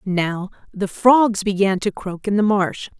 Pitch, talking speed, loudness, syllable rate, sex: 200 Hz, 180 wpm, -19 LUFS, 3.9 syllables/s, female